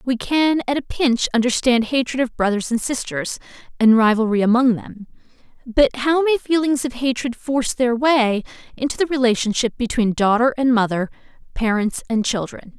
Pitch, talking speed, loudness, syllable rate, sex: 245 Hz, 160 wpm, -19 LUFS, 5.0 syllables/s, female